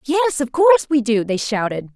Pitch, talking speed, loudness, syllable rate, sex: 265 Hz, 215 wpm, -17 LUFS, 5.1 syllables/s, female